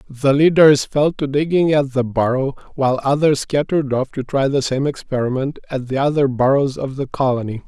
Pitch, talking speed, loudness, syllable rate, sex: 135 Hz, 190 wpm, -18 LUFS, 5.3 syllables/s, male